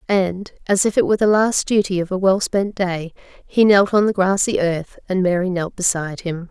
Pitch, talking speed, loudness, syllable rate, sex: 190 Hz, 220 wpm, -18 LUFS, 5.0 syllables/s, female